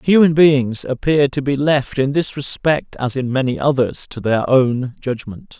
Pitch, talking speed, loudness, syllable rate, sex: 135 Hz, 180 wpm, -17 LUFS, 4.3 syllables/s, male